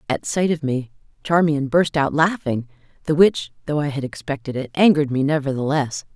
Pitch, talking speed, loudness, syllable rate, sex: 145 Hz, 175 wpm, -20 LUFS, 5.4 syllables/s, female